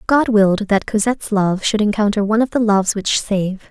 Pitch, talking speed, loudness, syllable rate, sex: 210 Hz, 210 wpm, -17 LUFS, 5.5 syllables/s, female